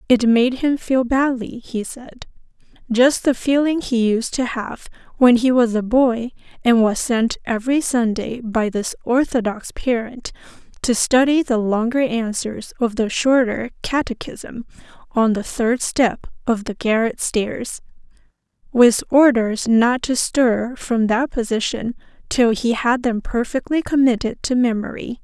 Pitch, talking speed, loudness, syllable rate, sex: 240 Hz, 145 wpm, -19 LUFS, 4.1 syllables/s, female